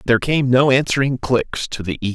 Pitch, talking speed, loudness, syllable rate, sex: 125 Hz, 250 wpm, -18 LUFS, 6.4 syllables/s, male